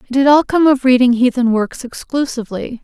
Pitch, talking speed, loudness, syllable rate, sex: 255 Hz, 190 wpm, -14 LUFS, 5.7 syllables/s, female